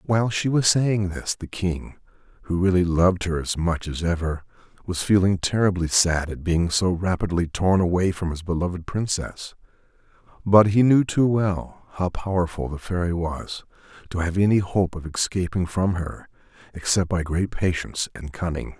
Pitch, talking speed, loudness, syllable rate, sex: 90 Hz, 170 wpm, -23 LUFS, 4.8 syllables/s, male